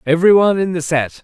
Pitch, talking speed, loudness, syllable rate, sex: 165 Hz, 195 wpm, -14 LUFS, 6.3 syllables/s, male